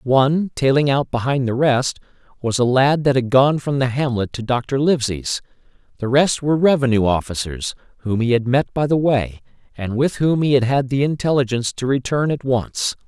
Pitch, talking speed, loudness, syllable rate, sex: 130 Hz, 195 wpm, -18 LUFS, 5.2 syllables/s, male